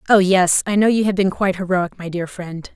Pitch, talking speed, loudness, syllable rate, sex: 185 Hz, 260 wpm, -18 LUFS, 5.6 syllables/s, female